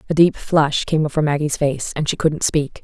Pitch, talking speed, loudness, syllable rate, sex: 150 Hz, 235 wpm, -18 LUFS, 5.0 syllables/s, female